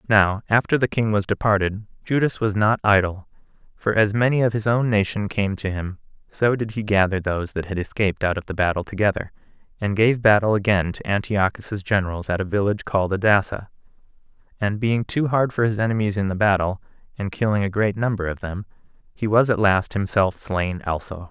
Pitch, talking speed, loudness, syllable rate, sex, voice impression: 105 Hz, 195 wpm, -21 LUFS, 5.7 syllables/s, male, masculine, adult-like, slightly thick, cool, sincere, slightly calm, slightly sweet